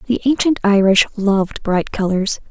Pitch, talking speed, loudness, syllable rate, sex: 210 Hz, 145 wpm, -16 LUFS, 4.8 syllables/s, female